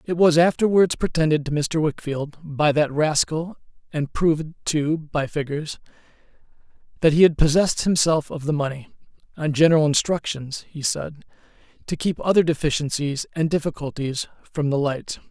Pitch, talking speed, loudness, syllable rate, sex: 155 Hz, 135 wpm, -22 LUFS, 4.5 syllables/s, male